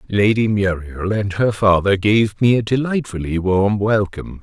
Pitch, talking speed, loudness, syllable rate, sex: 105 Hz, 150 wpm, -17 LUFS, 4.5 syllables/s, male